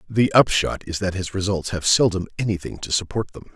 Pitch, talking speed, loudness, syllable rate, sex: 95 Hz, 200 wpm, -21 LUFS, 5.8 syllables/s, male